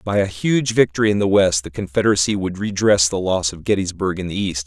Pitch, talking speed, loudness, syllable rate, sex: 95 Hz, 230 wpm, -18 LUFS, 5.9 syllables/s, male